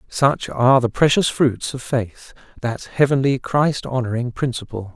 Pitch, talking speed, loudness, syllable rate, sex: 125 Hz, 135 wpm, -19 LUFS, 4.5 syllables/s, male